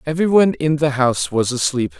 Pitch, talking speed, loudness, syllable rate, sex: 140 Hz, 180 wpm, -17 LUFS, 6.1 syllables/s, male